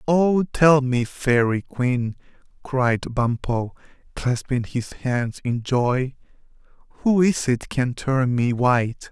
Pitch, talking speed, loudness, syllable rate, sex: 130 Hz, 125 wpm, -22 LUFS, 3.2 syllables/s, male